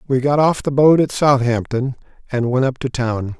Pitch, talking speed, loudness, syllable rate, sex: 130 Hz, 210 wpm, -17 LUFS, 4.8 syllables/s, male